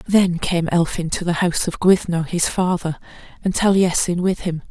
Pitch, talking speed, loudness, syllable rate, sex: 175 Hz, 180 wpm, -19 LUFS, 5.0 syllables/s, female